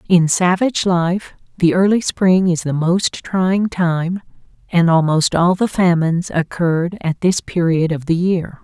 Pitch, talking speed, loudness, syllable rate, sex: 175 Hz, 160 wpm, -16 LUFS, 4.2 syllables/s, female